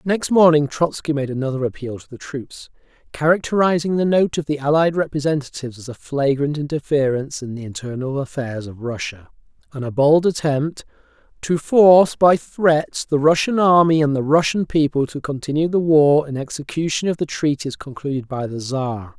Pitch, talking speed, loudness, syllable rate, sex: 145 Hz, 170 wpm, -19 LUFS, 5.2 syllables/s, male